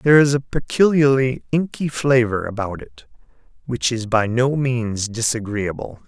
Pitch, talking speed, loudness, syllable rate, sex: 125 Hz, 140 wpm, -19 LUFS, 4.5 syllables/s, male